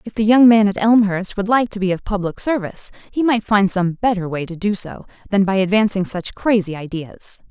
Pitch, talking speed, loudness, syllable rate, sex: 200 Hz, 225 wpm, -18 LUFS, 5.3 syllables/s, female